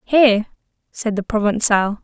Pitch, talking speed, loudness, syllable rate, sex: 220 Hz, 120 wpm, -17 LUFS, 4.7 syllables/s, female